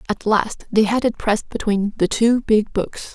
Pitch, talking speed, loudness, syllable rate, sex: 215 Hz, 210 wpm, -19 LUFS, 4.5 syllables/s, female